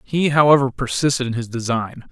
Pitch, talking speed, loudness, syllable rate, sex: 130 Hz, 170 wpm, -18 LUFS, 5.6 syllables/s, male